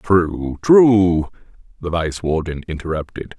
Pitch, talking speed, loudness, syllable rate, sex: 85 Hz, 105 wpm, -17 LUFS, 3.7 syllables/s, male